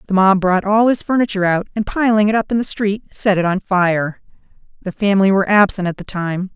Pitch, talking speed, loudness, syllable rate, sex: 200 Hz, 230 wpm, -16 LUFS, 5.9 syllables/s, female